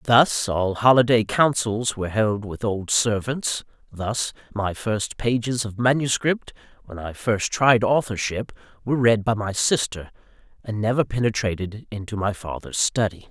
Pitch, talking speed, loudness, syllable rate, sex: 110 Hz, 145 wpm, -22 LUFS, 4.4 syllables/s, male